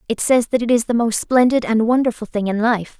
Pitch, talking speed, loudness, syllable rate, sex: 230 Hz, 260 wpm, -17 LUFS, 5.7 syllables/s, female